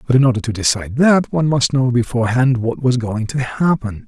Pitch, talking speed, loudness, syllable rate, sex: 125 Hz, 220 wpm, -16 LUFS, 5.9 syllables/s, male